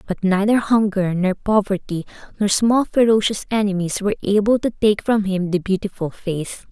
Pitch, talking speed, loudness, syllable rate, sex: 200 Hz, 160 wpm, -19 LUFS, 5.1 syllables/s, female